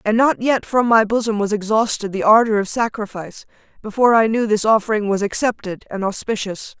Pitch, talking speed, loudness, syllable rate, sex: 215 Hz, 185 wpm, -18 LUFS, 5.7 syllables/s, female